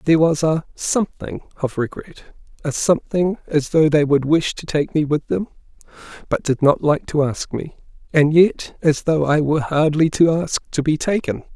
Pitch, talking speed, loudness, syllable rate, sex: 155 Hz, 190 wpm, -19 LUFS, 5.0 syllables/s, male